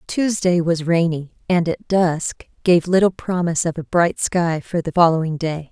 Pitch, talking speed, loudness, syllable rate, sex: 170 Hz, 180 wpm, -19 LUFS, 4.5 syllables/s, female